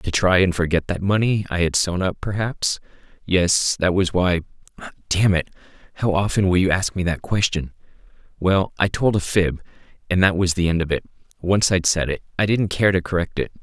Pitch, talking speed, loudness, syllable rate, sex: 90 Hz, 205 wpm, -20 LUFS, 5.3 syllables/s, male